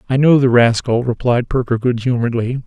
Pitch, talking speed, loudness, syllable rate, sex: 125 Hz, 180 wpm, -15 LUFS, 5.7 syllables/s, male